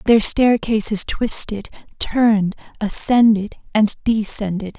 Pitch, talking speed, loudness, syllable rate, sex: 215 Hz, 90 wpm, -17 LUFS, 3.9 syllables/s, female